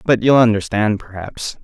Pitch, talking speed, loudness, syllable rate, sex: 110 Hz, 145 wpm, -16 LUFS, 4.7 syllables/s, male